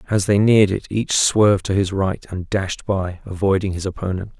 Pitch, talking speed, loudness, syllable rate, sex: 100 Hz, 205 wpm, -19 LUFS, 5.2 syllables/s, male